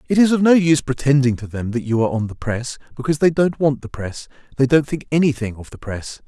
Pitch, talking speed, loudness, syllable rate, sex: 135 Hz, 260 wpm, -19 LUFS, 6.3 syllables/s, male